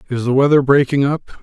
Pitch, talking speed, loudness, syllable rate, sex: 135 Hz, 210 wpm, -15 LUFS, 5.8 syllables/s, male